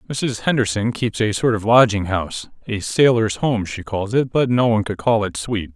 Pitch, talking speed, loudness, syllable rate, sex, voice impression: 110 Hz, 210 wpm, -19 LUFS, 5.1 syllables/s, male, very masculine, very adult-like, slightly old, very thick, tensed, very powerful, slightly bright, very soft, muffled, very fluent, slightly raspy, very cool, very intellectual, sincere, very calm, very mature, very friendly, very reassuring, very unique, elegant, wild, very sweet, lively, very kind